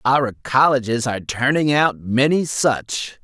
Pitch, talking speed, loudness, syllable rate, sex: 130 Hz, 130 wpm, -18 LUFS, 4.1 syllables/s, male